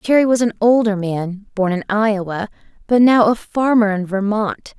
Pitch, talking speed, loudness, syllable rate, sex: 210 Hz, 175 wpm, -17 LUFS, 4.8 syllables/s, female